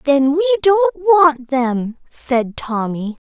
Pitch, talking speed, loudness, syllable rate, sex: 295 Hz, 130 wpm, -16 LUFS, 2.9 syllables/s, female